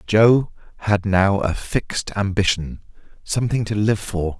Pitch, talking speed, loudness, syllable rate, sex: 100 Hz, 125 wpm, -20 LUFS, 4.3 syllables/s, male